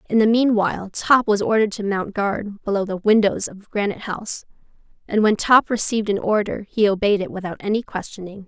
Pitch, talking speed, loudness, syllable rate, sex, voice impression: 205 Hz, 190 wpm, -20 LUFS, 5.7 syllables/s, female, very feminine, young, slightly thin, very tensed, very powerful, slightly bright, slightly soft, very clear, fluent, cool, intellectual, very refreshing, very sincere, calm, very friendly, reassuring, unique, slightly elegant, wild, slightly sweet, lively, slightly kind, slightly intense, modest, slightly light